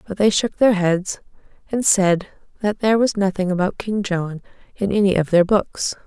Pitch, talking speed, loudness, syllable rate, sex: 195 Hz, 190 wpm, -19 LUFS, 4.8 syllables/s, female